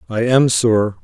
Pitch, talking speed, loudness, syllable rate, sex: 115 Hz, 175 wpm, -15 LUFS, 3.8 syllables/s, male